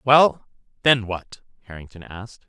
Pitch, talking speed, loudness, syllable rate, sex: 110 Hz, 120 wpm, -20 LUFS, 4.7 syllables/s, male